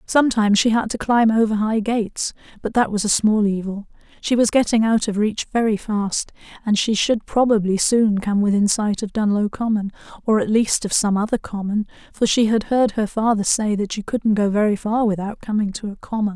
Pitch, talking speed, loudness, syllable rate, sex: 215 Hz, 215 wpm, -19 LUFS, 5.3 syllables/s, female